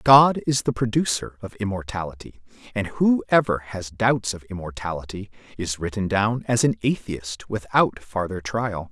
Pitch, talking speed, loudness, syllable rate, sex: 105 Hz, 140 wpm, -23 LUFS, 4.5 syllables/s, male